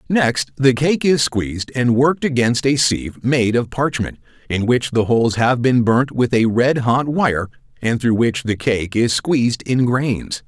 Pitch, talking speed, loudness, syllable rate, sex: 125 Hz, 195 wpm, -17 LUFS, 4.3 syllables/s, male